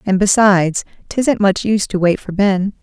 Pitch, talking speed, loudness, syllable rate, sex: 195 Hz, 190 wpm, -15 LUFS, 5.0 syllables/s, female